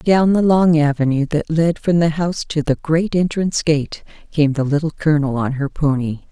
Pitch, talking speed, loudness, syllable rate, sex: 155 Hz, 200 wpm, -17 LUFS, 5.0 syllables/s, female